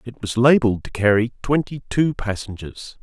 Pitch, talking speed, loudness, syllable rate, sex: 115 Hz, 160 wpm, -20 LUFS, 5.1 syllables/s, male